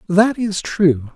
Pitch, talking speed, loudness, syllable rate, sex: 185 Hz, 155 wpm, -17 LUFS, 3.2 syllables/s, male